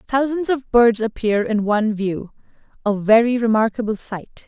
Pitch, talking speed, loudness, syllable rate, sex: 225 Hz, 135 wpm, -18 LUFS, 4.7 syllables/s, female